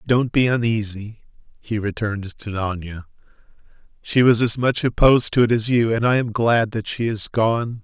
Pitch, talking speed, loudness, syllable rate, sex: 110 Hz, 185 wpm, -20 LUFS, 4.8 syllables/s, male